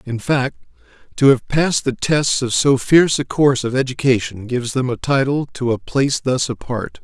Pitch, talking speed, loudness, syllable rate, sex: 130 Hz, 195 wpm, -17 LUFS, 5.2 syllables/s, male